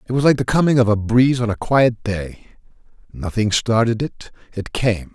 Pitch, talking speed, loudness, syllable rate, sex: 115 Hz, 200 wpm, -18 LUFS, 5.2 syllables/s, male